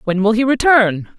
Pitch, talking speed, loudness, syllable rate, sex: 220 Hz, 200 wpm, -14 LUFS, 5.0 syllables/s, female